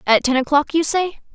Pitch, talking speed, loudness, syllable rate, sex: 295 Hz, 225 wpm, -18 LUFS, 5.4 syllables/s, female